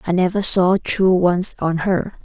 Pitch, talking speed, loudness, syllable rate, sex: 185 Hz, 190 wpm, -17 LUFS, 4.0 syllables/s, female